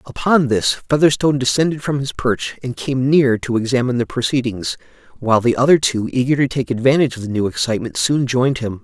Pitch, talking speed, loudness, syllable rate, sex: 130 Hz, 195 wpm, -17 LUFS, 6.1 syllables/s, male